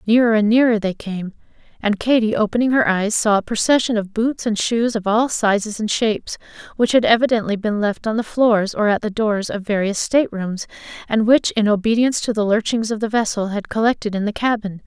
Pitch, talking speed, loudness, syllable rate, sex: 220 Hz, 210 wpm, -18 LUFS, 5.6 syllables/s, female